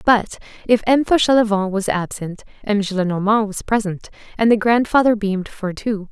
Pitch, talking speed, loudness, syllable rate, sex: 210 Hz, 155 wpm, -18 LUFS, 5.2 syllables/s, female